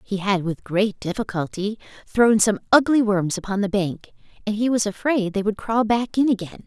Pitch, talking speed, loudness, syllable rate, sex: 205 Hz, 200 wpm, -21 LUFS, 5.0 syllables/s, female